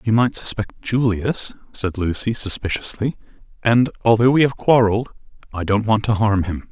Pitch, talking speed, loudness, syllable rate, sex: 110 Hz, 160 wpm, -19 LUFS, 5.0 syllables/s, male